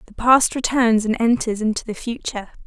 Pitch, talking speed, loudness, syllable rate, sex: 230 Hz, 180 wpm, -19 LUFS, 5.6 syllables/s, female